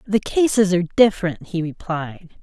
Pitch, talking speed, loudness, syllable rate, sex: 185 Hz, 150 wpm, -19 LUFS, 5.0 syllables/s, female